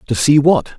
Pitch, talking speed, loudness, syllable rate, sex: 140 Hz, 230 wpm, -13 LUFS, 5.3 syllables/s, male